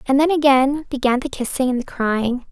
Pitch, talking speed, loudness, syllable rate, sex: 265 Hz, 215 wpm, -19 LUFS, 5.2 syllables/s, female